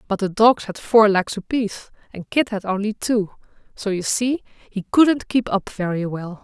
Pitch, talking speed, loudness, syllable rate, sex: 210 Hz, 195 wpm, -20 LUFS, 4.5 syllables/s, female